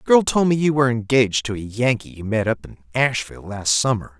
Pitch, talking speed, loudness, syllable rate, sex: 115 Hz, 230 wpm, -20 LUFS, 6.0 syllables/s, male